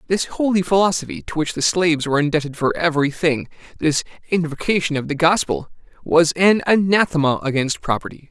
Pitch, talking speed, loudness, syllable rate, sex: 165 Hz, 160 wpm, -19 LUFS, 5.9 syllables/s, male